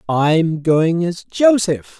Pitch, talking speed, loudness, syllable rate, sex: 170 Hz, 150 wpm, -16 LUFS, 3.3 syllables/s, male